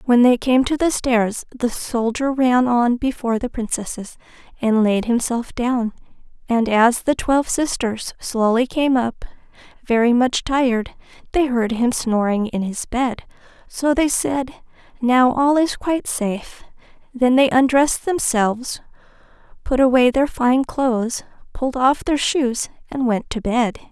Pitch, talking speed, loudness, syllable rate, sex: 245 Hz, 150 wpm, -19 LUFS, 4.3 syllables/s, female